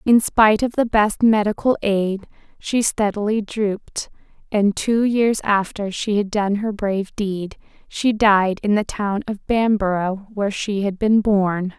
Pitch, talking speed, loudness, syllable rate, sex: 205 Hz, 165 wpm, -19 LUFS, 4.1 syllables/s, female